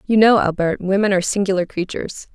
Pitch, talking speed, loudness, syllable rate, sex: 195 Hz, 180 wpm, -18 LUFS, 6.4 syllables/s, female